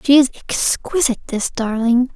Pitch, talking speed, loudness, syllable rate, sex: 250 Hz, 140 wpm, -17 LUFS, 5.2 syllables/s, female